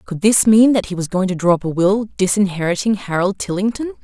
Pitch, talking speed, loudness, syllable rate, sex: 195 Hz, 225 wpm, -16 LUFS, 5.7 syllables/s, female